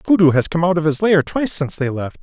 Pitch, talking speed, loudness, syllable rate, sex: 165 Hz, 295 wpm, -17 LUFS, 6.8 syllables/s, male